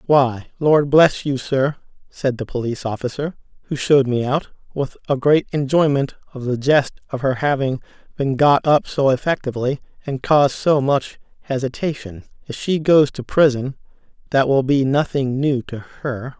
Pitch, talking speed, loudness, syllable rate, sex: 135 Hz, 165 wpm, -19 LUFS, 4.7 syllables/s, male